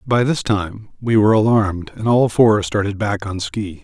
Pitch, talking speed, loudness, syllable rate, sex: 105 Hz, 205 wpm, -17 LUFS, 4.8 syllables/s, male